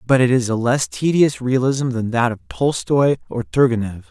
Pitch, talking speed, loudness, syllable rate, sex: 125 Hz, 190 wpm, -18 LUFS, 4.8 syllables/s, male